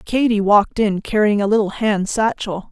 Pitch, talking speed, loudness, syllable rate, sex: 210 Hz, 175 wpm, -17 LUFS, 5.0 syllables/s, female